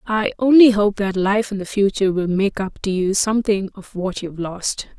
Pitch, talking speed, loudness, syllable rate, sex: 200 Hz, 230 wpm, -19 LUFS, 5.1 syllables/s, female